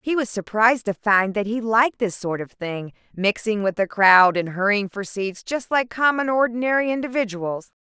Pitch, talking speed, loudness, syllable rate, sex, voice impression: 215 Hz, 190 wpm, -21 LUFS, 5.0 syllables/s, female, feminine, middle-aged, tensed, bright, clear, slightly raspy, intellectual, friendly, reassuring, elegant, lively, slightly kind